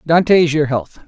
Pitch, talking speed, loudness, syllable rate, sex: 155 Hz, 170 wpm, -15 LUFS, 4.3 syllables/s, male